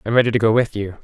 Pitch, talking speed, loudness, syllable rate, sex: 110 Hz, 345 wpm, -18 LUFS, 7.5 syllables/s, male